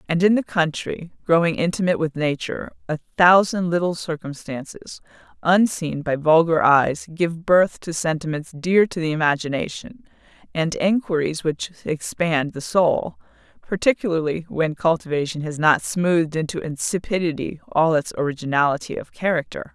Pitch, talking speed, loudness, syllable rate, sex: 165 Hz, 130 wpm, -21 LUFS, 4.9 syllables/s, female